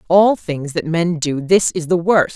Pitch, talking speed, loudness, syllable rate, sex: 170 Hz, 255 wpm, -17 LUFS, 4.3 syllables/s, female